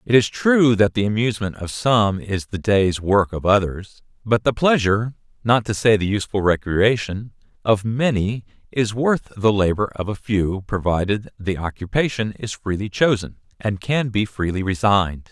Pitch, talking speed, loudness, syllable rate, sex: 105 Hz, 170 wpm, -20 LUFS, 4.8 syllables/s, male